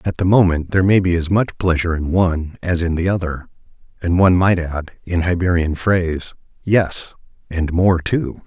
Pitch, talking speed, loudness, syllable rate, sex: 85 Hz, 185 wpm, -18 LUFS, 3.2 syllables/s, male